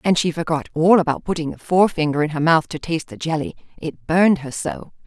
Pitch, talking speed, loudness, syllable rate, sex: 160 Hz, 225 wpm, -19 LUFS, 6.1 syllables/s, female